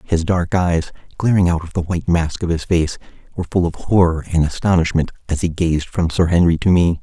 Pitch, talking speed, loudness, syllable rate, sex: 85 Hz, 220 wpm, -18 LUFS, 5.7 syllables/s, male